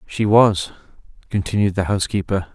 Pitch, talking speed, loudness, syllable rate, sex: 100 Hz, 120 wpm, -19 LUFS, 5.5 syllables/s, male